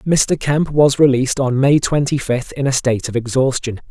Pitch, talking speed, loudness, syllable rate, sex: 135 Hz, 200 wpm, -16 LUFS, 5.0 syllables/s, male